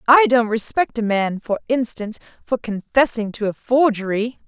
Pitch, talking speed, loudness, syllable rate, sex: 230 Hz, 160 wpm, -19 LUFS, 4.9 syllables/s, female